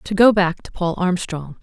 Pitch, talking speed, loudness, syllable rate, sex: 180 Hz, 220 wpm, -19 LUFS, 4.5 syllables/s, female